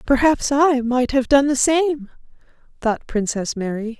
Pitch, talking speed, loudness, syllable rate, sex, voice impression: 260 Hz, 150 wpm, -19 LUFS, 4.1 syllables/s, female, feminine, adult-like, slightly relaxed, bright, soft, calm, friendly, reassuring, elegant, kind, modest